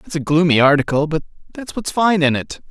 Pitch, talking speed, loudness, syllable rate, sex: 160 Hz, 220 wpm, -16 LUFS, 5.7 syllables/s, male